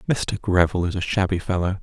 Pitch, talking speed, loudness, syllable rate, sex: 95 Hz, 195 wpm, -22 LUFS, 6.3 syllables/s, male